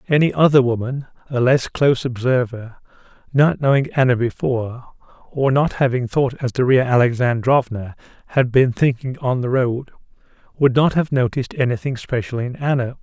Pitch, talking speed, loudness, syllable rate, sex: 130 Hz, 145 wpm, -18 LUFS, 5.3 syllables/s, male